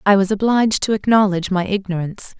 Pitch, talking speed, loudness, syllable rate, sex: 200 Hz, 175 wpm, -17 LUFS, 6.6 syllables/s, female